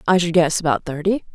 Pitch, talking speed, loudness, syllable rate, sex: 170 Hz, 225 wpm, -19 LUFS, 6.1 syllables/s, female